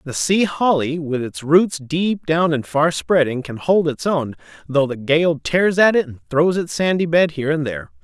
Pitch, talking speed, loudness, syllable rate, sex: 155 Hz, 215 wpm, -18 LUFS, 4.5 syllables/s, male